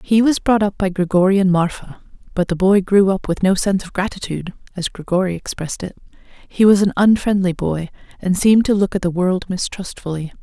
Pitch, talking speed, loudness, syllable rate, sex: 190 Hz, 200 wpm, -17 LUFS, 5.8 syllables/s, female